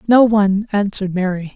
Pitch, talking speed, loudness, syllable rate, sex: 200 Hz, 155 wpm, -16 LUFS, 5.9 syllables/s, female